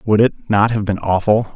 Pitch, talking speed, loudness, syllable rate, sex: 105 Hz, 230 wpm, -16 LUFS, 5.5 syllables/s, male